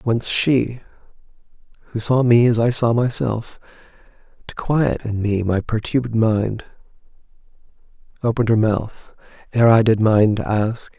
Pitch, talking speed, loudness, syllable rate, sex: 115 Hz, 135 wpm, -18 LUFS, 4.4 syllables/s, male